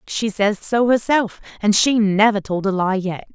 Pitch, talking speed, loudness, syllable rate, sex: 210 Hz, 180 wpm, -18 LUFS, 4.5 syllables/s, female